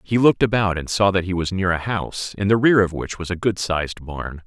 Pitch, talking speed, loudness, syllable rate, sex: 95 Hz, 280 wpm, -20 LUFS, 5.8 syllables/s, male